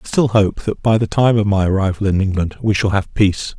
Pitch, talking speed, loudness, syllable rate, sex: 100 Hz, 270 wpm, -16 LUFS, 5.8 syllables/s, male